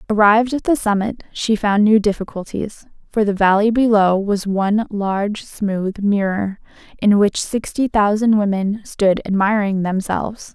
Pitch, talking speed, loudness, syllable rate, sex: 205 Hz, 140 wpm, -18 LUFS, 4.5 syllables/s, female